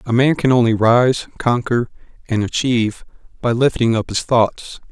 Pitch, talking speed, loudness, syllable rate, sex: 120 Hz, 160 wpm, -17 LUFS, 4.7 syllables/s, male